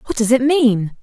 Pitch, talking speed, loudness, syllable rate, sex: 240 Hz, 235 wpm, -15 LUFS, 4.8 syllables/s, female